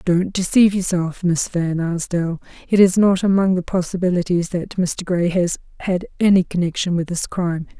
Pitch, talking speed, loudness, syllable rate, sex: 180 Hz, 170 wpm, -19 LUFS, 5.1 syllables/s, female